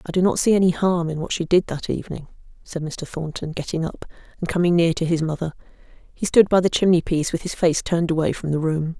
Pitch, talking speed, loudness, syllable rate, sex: 170 Hz, 245 wpm, -21 LUFS, 6.2 syllables/s, female